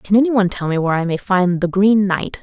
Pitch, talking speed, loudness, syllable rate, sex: 190 Hz, 270 wpm, -16 LUFS, 5.9 syllables/s, female